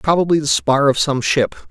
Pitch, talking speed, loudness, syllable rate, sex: 145 Hz, 210 wpm, -16 LUFS, 4.8 syllables/s, male